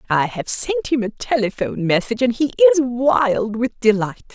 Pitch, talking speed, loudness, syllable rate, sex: 220 Hz, 180 wpm, -18 LUFS, 4.9 syllables/s, female